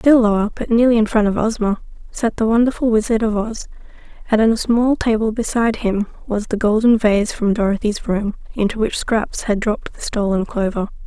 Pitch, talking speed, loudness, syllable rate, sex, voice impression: 220 Hz, 195 wpm, -18 LUFS, 5.4 syllables/s, female, feminine, adult-like, relaxed, weak, bright, soft, raspy, slightly cute, calm, friendly, reassuring, slightly sweet, kind, modest